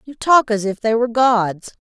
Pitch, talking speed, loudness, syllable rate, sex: 230 Hz, 225 wpm, -17 LUFS, 4.9 syllables/s, female